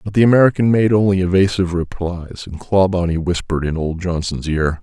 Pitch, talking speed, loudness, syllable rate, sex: 90 Hz, 175 wpm, -17 LUFS, 5.7 syllables/s, male